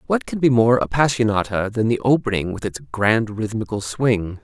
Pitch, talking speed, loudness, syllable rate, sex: 110 Hz, 175 wpm, -20 LUFS, 5.0 syllables/s, male